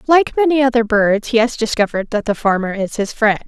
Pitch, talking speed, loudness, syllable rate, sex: 230 Hz, 225 wpm, -16 LUFS, 5.9 syllables/s, female